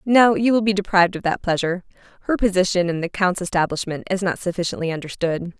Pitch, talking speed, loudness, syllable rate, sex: 185 Hz, 195 wpm, -20 LUFS, 6.4 syllables/s, female